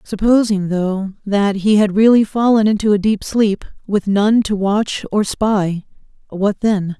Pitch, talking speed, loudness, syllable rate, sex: 205 Hz, 155 wpm, -16 LUFS, 3.9 syllables/s, female